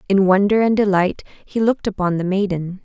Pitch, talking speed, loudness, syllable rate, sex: 195 Hz, 190 wpm, -18 LUFS, 5.5 syllables/s, female